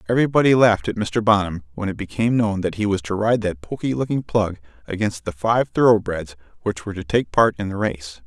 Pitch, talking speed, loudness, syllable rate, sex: 100 Hz, 220 wpm, -20 LUFS, 6.0 syllables/s, male